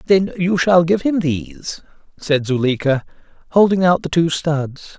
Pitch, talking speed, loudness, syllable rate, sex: 165 Hz, 155 wpm, -17 LUFS, 4.3 syllables/s, male